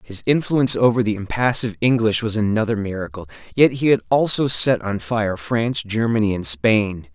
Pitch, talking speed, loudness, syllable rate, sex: 110 Hz, 170 wpm, -19 LUFS, 5.3 syllables/s, male